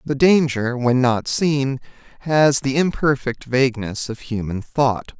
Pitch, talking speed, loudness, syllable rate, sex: 130 Hz, 140 wpm, -19 LUFS, 3.9 syllables/s, male